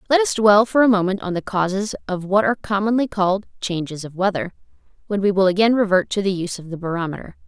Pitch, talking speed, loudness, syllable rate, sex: 195 Hz, 225 wpm, -20 LUFS, 6.6 syllables/s, female